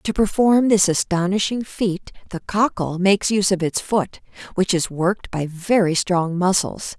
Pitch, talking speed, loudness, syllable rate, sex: 190 Hz, 165 wpm, -20 LUFS, 4.5 syllables/s, female